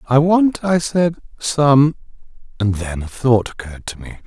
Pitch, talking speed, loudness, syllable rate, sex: 135 Hz, 170 wpm, -17 LUFS, 4.6 syllables/s, male